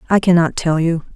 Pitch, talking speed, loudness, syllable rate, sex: 170 Hz, 260 wpm, -16 LUFS, 5.8 syllables/s, female